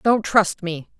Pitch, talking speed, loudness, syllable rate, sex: 195 Hz, 180 wpm, -20 LUFS, 3.6 syllables/s, female